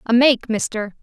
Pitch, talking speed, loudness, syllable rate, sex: 230 Hz, 175 wpm, -18 LUFS, 4.7 syllables/s, female